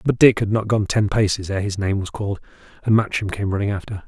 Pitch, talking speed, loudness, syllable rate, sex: 105 Hz, 250 wpm, -20 LUFS, 6.2 syllables/s, male